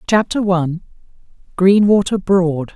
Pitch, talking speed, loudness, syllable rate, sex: 185 Hz, 85 wpm, -15 LUFS, 4.4 syllables/s, female